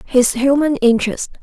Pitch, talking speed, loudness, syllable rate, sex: 260 Hz, 125 wpm, -15 LUFS, 4.9 syllables/s, female